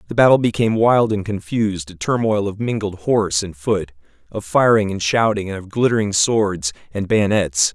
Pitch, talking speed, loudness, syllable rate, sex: 100 Hz, 180 wpm, -18 LUFS, 5.2 syllables/s, male